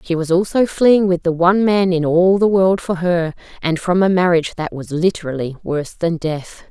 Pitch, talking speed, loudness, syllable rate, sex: 175 Hz, 215 wpm, -17 LUFS, 5.2 syllables/s, female